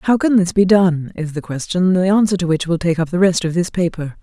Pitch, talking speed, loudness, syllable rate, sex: 175 Hz, 270 wpm, -16 LUFS, 5.6 syllables/s, female